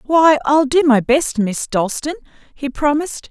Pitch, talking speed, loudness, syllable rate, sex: 280 Hz, 165 wpm, -16 LUFS, 4.3 syllables/s, female